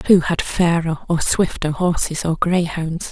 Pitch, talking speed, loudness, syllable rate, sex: 170 Hz, 155 wpm, -19 LUFS, 4.2 syllables/s, female